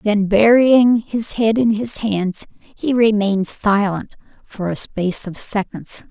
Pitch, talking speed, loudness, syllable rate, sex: 210 Hz, 145 wpm, -17 LUFS, 3.8 syllables/s, female